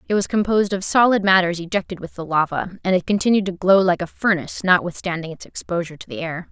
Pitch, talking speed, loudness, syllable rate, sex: 185 Hz, 220 wpm, -20 LUFS, 6.7 syllables/s, female